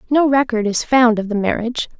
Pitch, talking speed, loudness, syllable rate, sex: 235 Hz, 210 wpm, -17 LUFS, 5.9 syllables/s, female